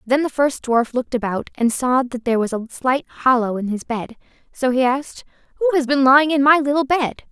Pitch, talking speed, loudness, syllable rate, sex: 255 Hz, 230 wpm, -19 LUFS, 5.5 syllables/s, female